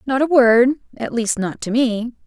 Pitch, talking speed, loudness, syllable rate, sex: 245 Hz, 185 wpm, -17 LUFS, 4.5 syllables/s, female